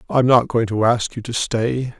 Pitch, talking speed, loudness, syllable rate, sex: 120 Hz, 240 wpm, -18 LUFS, 4.5 syllables/s, male